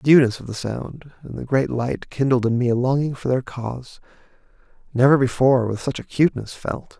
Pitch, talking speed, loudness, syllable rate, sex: 130 Hz, 195 wpm, -21 LUFS, 5.6 syllables/s, male